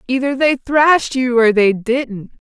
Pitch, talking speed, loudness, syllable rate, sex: 250 Hz, 165 wpm, -14 LUFS, 4.2 syllables/s, female